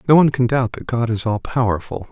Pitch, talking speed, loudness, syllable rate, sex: 120 Hz, 255 wpm, -19 LUFS, 6.2 syllables/s, male